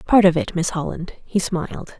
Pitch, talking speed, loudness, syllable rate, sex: 180 Hz, 210 wpm, -21 LUFS, 5.0 syllables/s, female